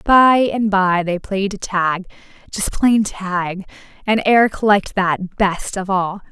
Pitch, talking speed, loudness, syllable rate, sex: 195 Hz, 150 wpm, -17 LUFS, 3.4 syllables/s, female